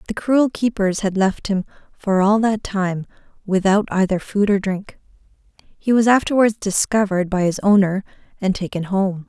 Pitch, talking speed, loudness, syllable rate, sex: 200 Hz, 160 wpm, -19 LUFS, 4.8 syllables/s, female